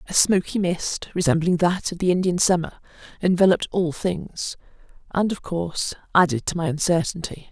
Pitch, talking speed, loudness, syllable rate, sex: 175 Hz, 150 wpm, -22 LUFS, 5.3 syllables/s, female